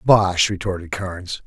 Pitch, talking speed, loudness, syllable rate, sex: 95 Hz, 125 wpm, -21 LUFS, 4.4 syllables/s, male